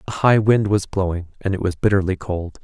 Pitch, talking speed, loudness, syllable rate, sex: 95 Hz, 225 wpm, -20 LUFS, 5.5 syllables/s, male